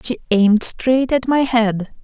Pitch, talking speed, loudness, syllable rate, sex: 240 Hz, 175 wpm, -16 LUFS, 4.0 syllables/s, female